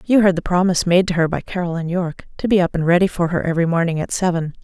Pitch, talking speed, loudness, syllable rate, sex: 175 Hz, 270 wpm, -18 LUFS, 7.4 syllables/s, female